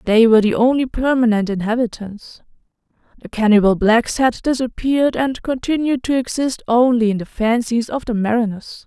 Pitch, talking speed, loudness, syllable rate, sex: 235 Hz, 150 wpm, -17 LUFS, 5.2 syllables/s, female